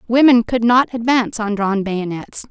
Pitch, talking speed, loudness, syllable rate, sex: 225 Hz, 170 wpm, -16 LUFS, 4.7 syllables/s, female